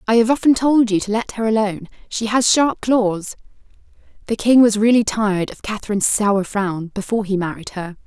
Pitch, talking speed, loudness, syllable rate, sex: 215 Hz, 195 wpm, -18 LUFS, 5.5 syllables/s, female